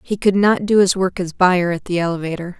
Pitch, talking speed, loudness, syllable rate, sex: 185 Hz, 255 wpm, -17 LUFS, 5.6 syllables/s, female